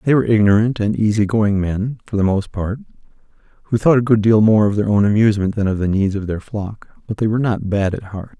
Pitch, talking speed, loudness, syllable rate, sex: 105 Hz, 245 wpm, -17 LUFS, 6.1 syllables/s, male